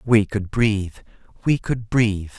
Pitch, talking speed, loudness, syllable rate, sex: 110 Hz, 150 wpm, -21 LUFS, 4.6 syllables/s, male